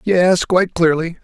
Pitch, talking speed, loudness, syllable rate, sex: 175 Hz, 145 wpm, -15 LUFS, 4.6 syllables/s, male